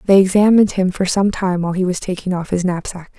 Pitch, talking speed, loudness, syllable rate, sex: 185 Hz, 245 wpm, -16 LUFS, 6.4 syllables/s, female